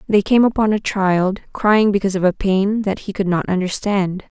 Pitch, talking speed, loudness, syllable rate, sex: 200 Hz, 205 wpm, -18 LUFS, 5.0 syllables/s, female